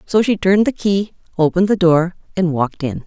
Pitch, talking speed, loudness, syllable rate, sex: 180 Hz, 215 wpm, -16 LUFS, 6.0 syllables/s, female